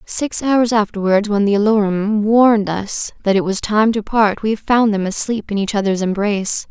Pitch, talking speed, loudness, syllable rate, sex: 210 Hz, 195 wpm, -16 LUFS, 4.8 syllables/s, female